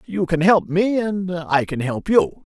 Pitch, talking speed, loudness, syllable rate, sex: 180 Hz, 210 wpm, -19 LUFS, 3.8 syllables/s, male